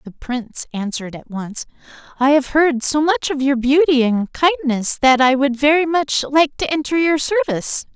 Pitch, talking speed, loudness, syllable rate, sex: 280 Hz, 190 wpm, -17 LUFS, 4.7 syllables/s, female